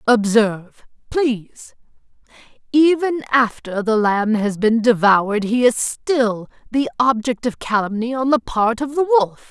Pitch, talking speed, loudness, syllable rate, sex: 235 Hz, 135 wpm, -18 LUFS, 4.1 syllables/s, female